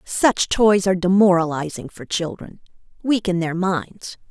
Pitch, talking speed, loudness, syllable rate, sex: 185 Hz, 110 wpm, -19 LUFS, 4.3 syllables/s, female